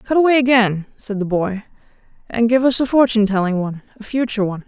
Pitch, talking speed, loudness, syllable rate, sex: 225 Hz, 205 wpm, -17 LUFS, 6.9 syllables/s, female